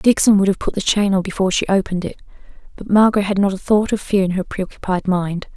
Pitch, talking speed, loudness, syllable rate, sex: 195 Hz, 260 wpm, -18 LUFS, 6.8 syllables/s, female